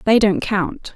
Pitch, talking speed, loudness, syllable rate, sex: 210 Hz, 190 wpm, -18 LUFS, 3.6 syllables/s, female